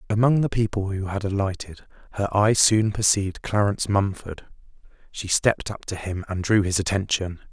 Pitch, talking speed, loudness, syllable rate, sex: 100 Hz, 170 wpm, -23 LUFS, 5.3 syllables/s, male